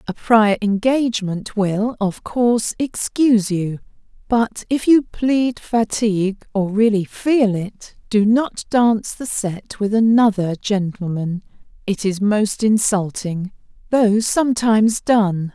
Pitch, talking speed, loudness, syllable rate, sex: 215 Hz, 125 wpm, -18 LUFS, 3.7 syllables/s, female